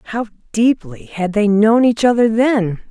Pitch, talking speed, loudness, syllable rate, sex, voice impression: 215 Hz, 165 wpm, -15 LUFS, 4.4 syllables/s, female, feminine, adult-like, slightly relaxed, bright, soft, slightly raspy, intellectual, calm, friendly, reassuring, elegant, slightly lively, slightly kind, slightly modest